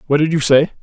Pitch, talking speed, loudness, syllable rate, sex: 150 Hz, 290 wpm, -14 LUFS, 7.7 syllables/s, male